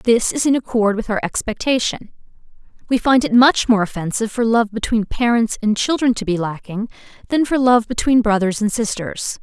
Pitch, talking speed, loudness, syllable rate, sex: 225 Hz, 185 wpm, -18 LUFS, 5.3 syllables/s, female